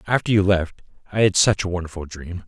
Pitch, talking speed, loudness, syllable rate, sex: 95 Hz, 220 wpm, -20 LUFS, 5.9 syllables/s, male